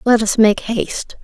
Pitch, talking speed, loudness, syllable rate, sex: 220 Hz, 195 wpm, -16 LUFS, 4.6 syllables/s, female